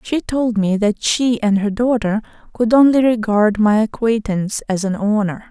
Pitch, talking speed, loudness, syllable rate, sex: 220 Hz, 175 wpm, -17 LUFS, 4.6 syllables/s, female